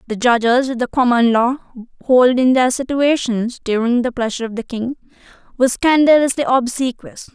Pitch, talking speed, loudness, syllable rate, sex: 250 Hz, 145 wpm, -16 LUFS, 5.3 syllables/s, female